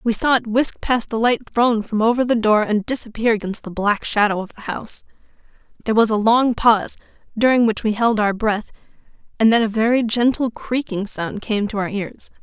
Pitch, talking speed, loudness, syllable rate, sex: 220 Hz, 210 wpm, -19 LUFS, 5.4 syllables/s, female